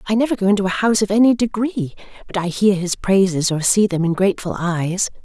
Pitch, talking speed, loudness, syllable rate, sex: 195 Hz, 230 wpm, -18 LUFS, 6.0 syllables/s, female